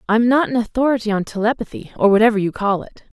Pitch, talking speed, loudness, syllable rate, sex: 220 Hz, 205 wpm, -18 LUFS, 6.5 syllables/s, female